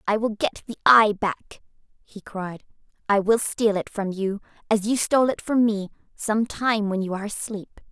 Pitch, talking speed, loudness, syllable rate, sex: 210 Hz, 195 wpm, -23 LUFS, 4.8 syllables/s, female